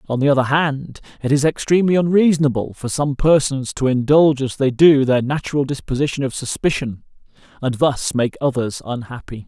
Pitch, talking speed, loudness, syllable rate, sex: 135 Hz, 165 wpm, -18 LUFS, 5.6 syllables/s, male